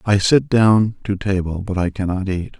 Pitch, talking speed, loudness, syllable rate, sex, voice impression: 100 Hz, 210 wpm, -18 LUFS, 4.6 syllables/s, male, very masculine, very adult-like, slightly old, very thick, slightly relaxed, very powerful, slightly dark, slightly hard, muffled, fluent, very cool, very intellectual, very sincere, very calm, very mature, friendly, very reassuring, slightly unique, very elegant, wild, slightly sweet, kind, slightly modest